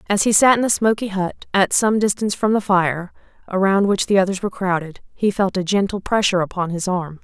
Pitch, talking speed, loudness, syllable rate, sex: 195 Hz, 225 wpm, -19 LUFS, 5.8 syllables/s, female